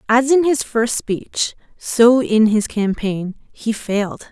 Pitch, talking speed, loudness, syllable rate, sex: 225 Hz, 155 wpm, -17 LUFS, 3.5 syllables/s, female